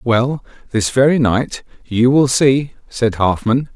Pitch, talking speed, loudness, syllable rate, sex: 125 Hz, 145 wpm, -16 LUFS, 3.6 syllables/s, male